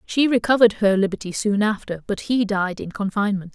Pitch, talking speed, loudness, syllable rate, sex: 205 Hz, 185 wpm, -21 LUFS, 5.9 syllables/s, female